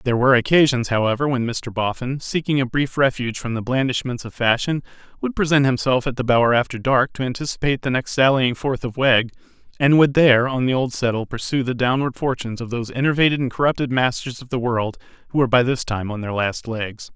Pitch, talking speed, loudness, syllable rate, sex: 125 Hz, 215 wpm, -20 LUFS, 6.2 syllables/s, male